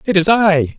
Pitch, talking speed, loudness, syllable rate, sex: 180 Hz, 230 wpm, -13 LUFS, 4.4 syllables/s, male